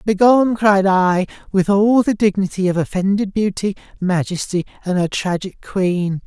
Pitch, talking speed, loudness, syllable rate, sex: 195 Hz, 145 wpm, -17 LUFS, 4.6 syllables/s, male